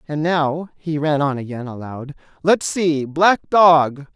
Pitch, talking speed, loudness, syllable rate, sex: 150 Hz, 145 wpm, -18 LUFS, 3.7 syllables/s, male